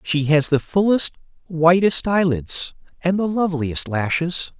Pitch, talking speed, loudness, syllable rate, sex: 170 Hz, 130 wpm, -19 LUFS, 4.2 syllables/s, male